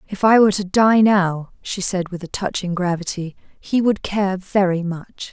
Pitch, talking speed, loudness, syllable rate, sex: 190 Hz, 190 wpm, -19 LUFS, 4.5 syllables/s, female